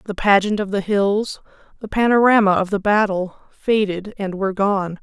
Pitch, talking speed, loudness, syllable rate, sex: 200 Hz, 165 wpm, -18 LUFS, 4.8 syllables/s, female